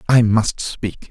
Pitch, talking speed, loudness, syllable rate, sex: 110 Hz, 160 wpm, -18 LUFS, 3.2 syllables/s, male